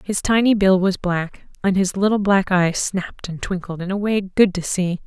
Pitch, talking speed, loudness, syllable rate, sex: 190 Hz, 225 wpm, -19 LUFS, 4.8 syllables/s, female